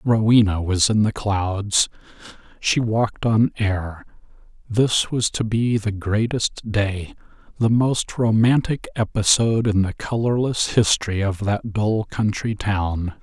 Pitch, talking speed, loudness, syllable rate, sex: 105 Hz, 130 wpm, -20 LUFS, 3.9 syllables/s, male